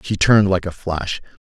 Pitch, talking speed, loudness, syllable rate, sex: 95 Hz, 205 wpm, -18 LUFS, 5.3 syllables/s, male